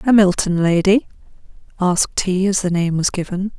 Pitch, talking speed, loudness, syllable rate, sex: 185 Hz, 165 wpm, -17 LUFS, 5.1 syllables/s, female